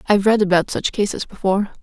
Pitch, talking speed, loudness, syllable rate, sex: 200 Hz, 195 wpm, -19 LUFS, 7.1 syllables/s, female